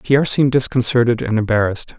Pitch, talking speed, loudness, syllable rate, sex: 120 Hz, 150 wpm, -16 LUFS, 7.0 syllables/s, male